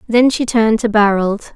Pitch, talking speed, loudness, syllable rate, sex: 220 Hz, 195 wpm, -14 LUFS, 5.1 syllables/s, female